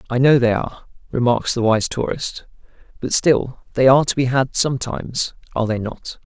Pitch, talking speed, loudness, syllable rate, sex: 125 Hz, 180 wpm, -19 LUFS, 5.4 syllables/s, male